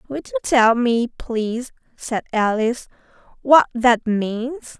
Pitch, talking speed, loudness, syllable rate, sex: 240 Hz, 125 wpm, -19 LUFS, 3.6 syllables/s, female